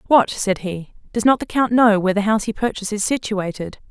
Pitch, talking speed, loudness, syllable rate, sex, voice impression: 210 Hz, 230 wpm, -19 LUFS, 6.0 syllables/s, female, very feminine, slightly young, adult-like, thin, slightly tensed, powerful, bright, soft, very clear, very fluent, very cute, intellectual, refreshing, very sincere, calm, very friendly, very reassuring, very unique, elegant, sweet, lively, slightly strict, slightly intense, modest, light